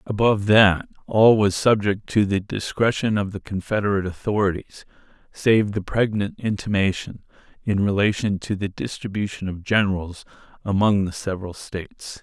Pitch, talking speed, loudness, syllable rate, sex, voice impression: 100 Hz, 135 wpm, -22 LUFS, 5.1 syllables/s, male, masculine, middle-aged, tensed, powerful, slightly soft, slightly muffled, raspy, cool, calm, mature, friendly, reassuring, wild, kind